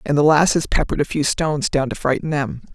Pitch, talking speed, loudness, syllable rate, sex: 145 Hz, 240 wpm, -19 LUFS, 6.3 syllables/s, female